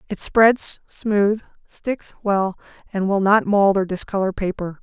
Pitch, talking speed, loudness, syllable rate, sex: 200 Hz, 150 wpm, -20 LUFS, 3.9 syllables/s, female